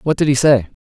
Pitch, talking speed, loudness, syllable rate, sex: 140 Hz, 290 wpm, -14 LUFS, 6.6 syllables/s, male